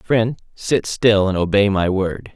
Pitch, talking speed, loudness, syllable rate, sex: 100 Hz, 180 wpm, -18 LUFS, 3.7 syllables/s, male